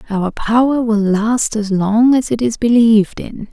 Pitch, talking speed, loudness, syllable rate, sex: 225 Hz, 190 wpm, -14 LUFS, 4.2 syllables/s, female